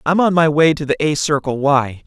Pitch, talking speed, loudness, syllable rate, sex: 150 Hz, 260 wpm, -16 LUFS, 5.2 syllables/s, male